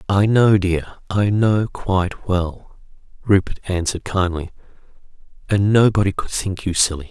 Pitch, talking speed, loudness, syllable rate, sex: 95 Hz, 135 wpm, -19 LUFS, 4.6 syllables/s, male